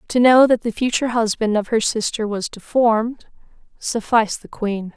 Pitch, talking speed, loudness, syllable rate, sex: 225 Hz, 170 wpm, -19 LUFS, 5.1 syllables/s, female